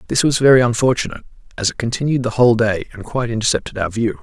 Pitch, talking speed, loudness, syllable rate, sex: 115 Hz, 215 wpm, -17 LUFS, 7.7 syllables/s, male